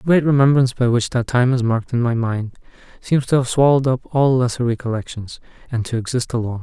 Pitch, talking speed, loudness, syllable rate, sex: 125 Hz, 215 wpm, -18 LUFS, 6.4 syllables/s, male